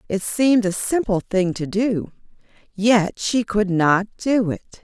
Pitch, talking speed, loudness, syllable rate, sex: 205 Hz, 160 wpm, -20 LUFS, 4.0 syllables/s, female